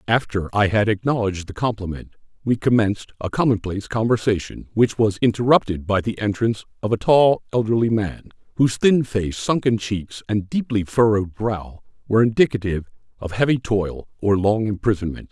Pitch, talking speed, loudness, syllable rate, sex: 110 Hz, 155 wpm, -21 LUFS, 5.6 syllables/s, male